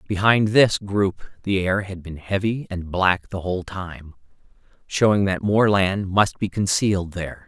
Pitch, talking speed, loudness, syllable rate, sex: 95 Hz, 170 wpm, -21 LUFS, 4.4 syllables/s, male